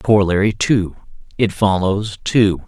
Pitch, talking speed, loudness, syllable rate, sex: 100 Hz, 90 wpm, -17 LUFS, 4.0 syllables/s, male